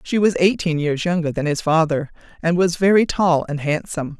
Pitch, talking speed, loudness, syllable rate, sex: 165 Hz, 200 wpm, -19 LUFS, 5.4 syllables/s, female